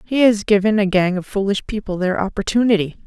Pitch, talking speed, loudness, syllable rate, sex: 200 Hz, 195 wpm, -18 LUFS, 5.9 syllables/s, female